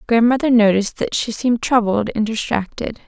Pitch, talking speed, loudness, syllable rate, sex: 225 Hz, 155 wpm, -18 LUFS, 5.6 syllables/s, female